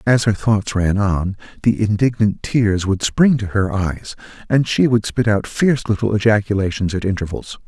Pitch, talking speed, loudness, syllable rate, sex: 105 Hz, 180 wpm, -18 LUFS, 4.8 syllables/s, male